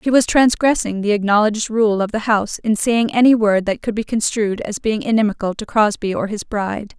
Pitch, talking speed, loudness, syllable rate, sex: 215 Hz, 215 wpm, -17 LUFS, 5.5 syllables/s, female